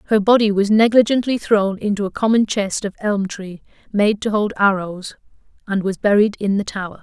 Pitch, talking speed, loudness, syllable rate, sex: 205 Hz, 190 wpm, -18 LUFS, 5.3 syllables/s, female